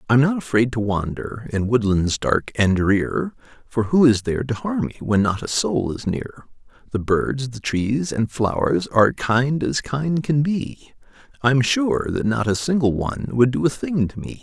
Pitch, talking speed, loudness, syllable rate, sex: 125 Hz, 200 wpm, -21 LUFS, 4.4 syllables/s, male